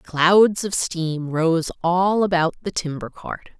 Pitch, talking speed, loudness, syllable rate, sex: 170 Hz, 150 wpm, -20 LUFS, 3.3 syllables/s, female